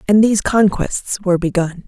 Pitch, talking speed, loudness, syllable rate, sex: 190 Hz, 160 wpm, -16 LUFS, 5.5 syllables/s, female